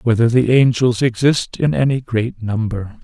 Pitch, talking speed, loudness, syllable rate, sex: 120 Hz, 160 wpm, -16 LUFS, 4.4 syllables/s, male